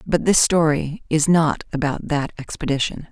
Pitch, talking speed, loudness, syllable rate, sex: 155 Hz, 155 wpm, -20 LUFS, 4.7 syllables/s, female